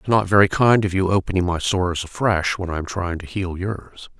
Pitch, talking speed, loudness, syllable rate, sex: 95 Hz, 255 wpm, -20 LUFS, 5.8 syllables/s, male